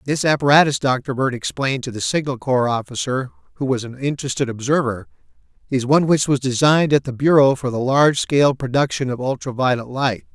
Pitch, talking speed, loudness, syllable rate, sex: 130 Hz, 185 wpm, -19 LUFS, 5.9 syllables/s, male